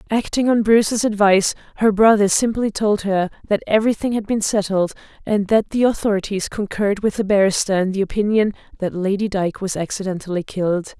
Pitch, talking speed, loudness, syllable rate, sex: 205 Hz, 170 wpm, -19 LUFS, 5.8 syllables/s, female